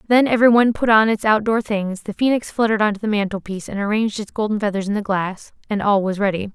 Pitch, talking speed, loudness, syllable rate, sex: 210 Hz, 250 wpm, -19 LUFS, 6.8 syllables/s, female